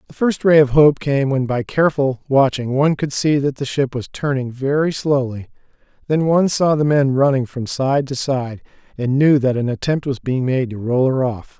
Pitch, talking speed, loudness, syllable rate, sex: 135 Hz, 215 wpm, -18 LUFS, 5.0 syllables/s, male